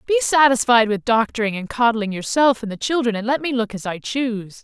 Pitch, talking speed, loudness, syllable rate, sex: 235 Hz, 220 wpm, -19 LUFS, 5.7 syllables/s, female